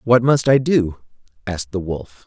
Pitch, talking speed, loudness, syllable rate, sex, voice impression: 110 Hz, 185 wpm, -19 LUFS, 4.6 syllables/s, male, masculine, adult-like, tensed, bright, clear, fluent, cool, intellectual, refreshing, friendly, reassuring, lively, kind, slightly light